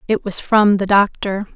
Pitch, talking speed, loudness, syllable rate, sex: 200 Hz, 195 wpm, -16 LUFS, 4.4 syllables/s, female